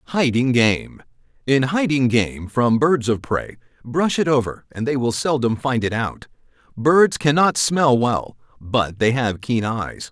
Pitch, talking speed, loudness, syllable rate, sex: 125 Hz, 160 wpm, -19 LUFS, 3.9 syllables/s, male